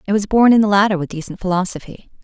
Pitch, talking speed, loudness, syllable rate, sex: 195 Hz, 240 wpm, -16 LUFS, 7.5 syllables/s, female